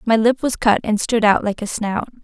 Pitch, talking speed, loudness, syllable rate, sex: 220 Hz, 270 wpm, -18 LUFS, 5.2 syllables/s, female